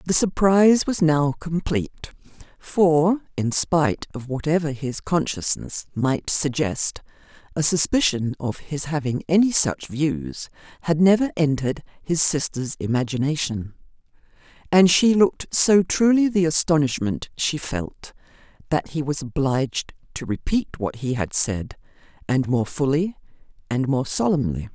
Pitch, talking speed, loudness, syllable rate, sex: 150 Hz, 130 wpm, -21 LUFS, 4.4 syllables/s, female